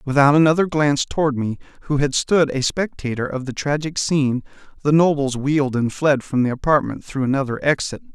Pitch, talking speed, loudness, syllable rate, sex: 140 Hz, 185 wpm, -19 LUFS, 5.7 syllables/s, male